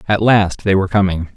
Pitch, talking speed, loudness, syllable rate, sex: 95 Hz, 220 wpm, -15 LUFS, 6.0 syllables/s, male